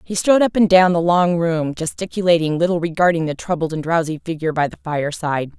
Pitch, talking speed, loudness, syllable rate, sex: 170 Hz, 195 wpm, -18 LUFS, 6.3 syllables/s, female